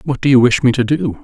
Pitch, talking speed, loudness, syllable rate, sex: 130 Hz, 340 wpm, -13 LUFS, 6.3 syllables/s, male